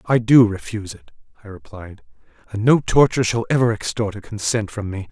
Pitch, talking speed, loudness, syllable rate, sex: 110 Hz, 190 wpm, -19 LUFS, 5.8 syllables/s, male